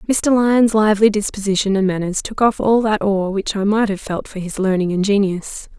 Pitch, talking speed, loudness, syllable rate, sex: 205 Hz, 220 wpm, -17 LUFS, 5.3 syllables/s, female